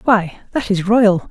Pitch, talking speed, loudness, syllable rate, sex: 205 Hz, 185 wpm, -16 LUFS, 3.7 syllables/s, female